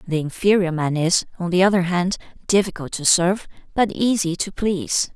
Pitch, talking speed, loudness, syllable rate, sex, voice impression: 180 Hz, 175 wpm, -20 LUFS, 5.4 syllables/s, female, feminine, middle-aged, slightly relaxed, hard, clear, slightly raspy, intellectual, elegant, lively, slightly sharp, modest